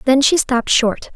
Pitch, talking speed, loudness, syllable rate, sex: 255 Hz, 210 wpm, -15 LUFS, 5.0 syllables/s, female